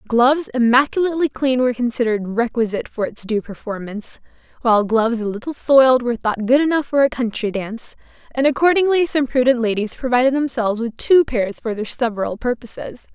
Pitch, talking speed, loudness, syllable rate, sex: 245 Hz, 170 wpm, -18 LUFS, 6.1 syllables/s, female